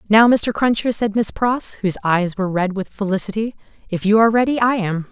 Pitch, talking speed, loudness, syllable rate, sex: 210 Hz, 210 wpm, -18 LUFS, 5.9 syllables/s, female